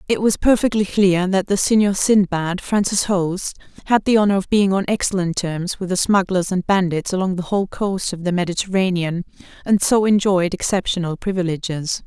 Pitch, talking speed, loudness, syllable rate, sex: 190 Hz, 175 wpm, -19 LUFS, 5.1 syllables/s, female